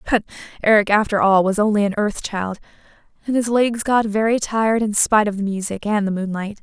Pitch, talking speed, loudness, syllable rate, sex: 210 Hz, 210 wpm, -19 LUFS, 5.9 syllables/s, female